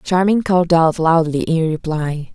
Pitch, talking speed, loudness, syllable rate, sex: 165 Hz, 155 wpm, -16 LUFS, 4.4 syllables/s, female